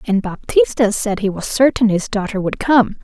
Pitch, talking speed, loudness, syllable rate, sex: 220 Hz, 200 wpm, -17 LUFS, 4.8 syllables/s, female